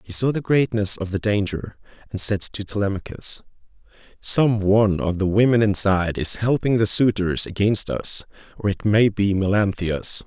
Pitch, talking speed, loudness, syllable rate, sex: 105 Hz, 165 wpm, -20 LUFS, 4.8 syllables/s, male